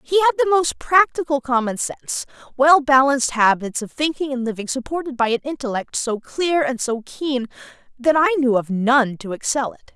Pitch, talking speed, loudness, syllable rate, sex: 270 Hz, 180 wpm, -19 LUFS, 5.2 syllables/s, female